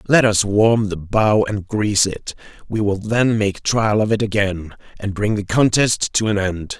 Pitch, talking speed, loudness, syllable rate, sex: 105 Hz, 195 wpm, -18 LUFS, 4.3 syllables/s, male